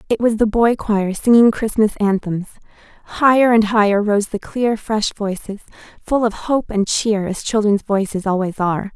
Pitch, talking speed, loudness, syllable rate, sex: 210 Hz, 175 wpm, -17 LUFS, 4.7 syllables/s, female